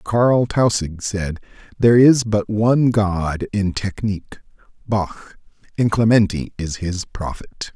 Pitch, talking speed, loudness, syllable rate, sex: 105 Hz, 125 wpm, -19 LUFS, 3.8 syllables/s, male